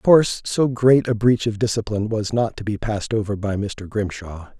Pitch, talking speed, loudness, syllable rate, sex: 110 Hz, 220 wpm, -21 LUFS, 5.3 syllables/s, male